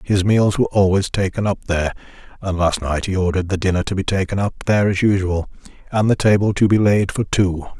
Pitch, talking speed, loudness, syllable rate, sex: 95 Hz, 225 wpm, -18 LUFS, 6.1 syllables/s, male